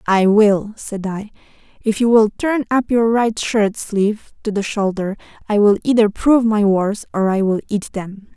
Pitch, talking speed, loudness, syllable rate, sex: 210 Hz, 195 wpm, -17 LUFS, 4.5 syllables/s, female